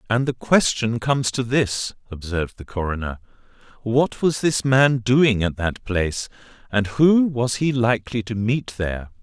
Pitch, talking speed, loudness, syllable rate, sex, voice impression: 115 Hz, 165 wpm, -21 LUFS, 4.5 syllables/s, male, masculine, adult-like, tensed, clear, fluent, intellectual, sincere, slightly mature, slightly elegant, wild, slightly strict